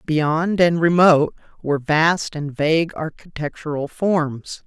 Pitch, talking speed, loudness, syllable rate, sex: 155 Hz, 115 wpm, -19 LUFS, 4.0 syllables/s, female